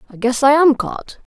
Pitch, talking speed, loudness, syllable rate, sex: 270 Hz, 225 wpm, -15 LUFS, 4.9 syllables/s, female